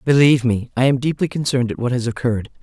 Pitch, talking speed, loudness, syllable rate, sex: 130 Hz, 230 wpm, -18 LUFS, 7.1 syllables/s, female